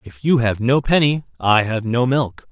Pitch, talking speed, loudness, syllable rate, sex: 125 Hz, 215 wpm, -18 LUFS, 4.5 syllables/s, male